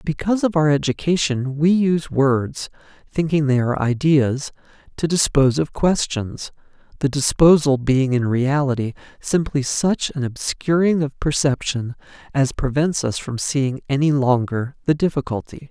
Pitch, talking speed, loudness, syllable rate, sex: 140 Hz, 135 wpm, -19 LUFS, 4.6 syllables/s, male